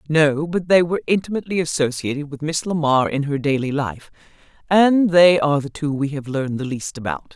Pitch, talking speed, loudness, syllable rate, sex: 150 Hz, 195 wpm, -19 LUFS, 5.7 syllables/s, female